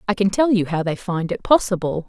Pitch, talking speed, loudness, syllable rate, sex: 190 Hz, 260 wpm, -20 LUFS, 5.8 syllables/s, female